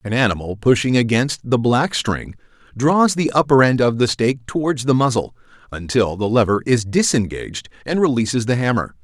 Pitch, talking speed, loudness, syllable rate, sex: 125 Hz, 175 wpm, -18 LUFS, 5.3 syllables/s, male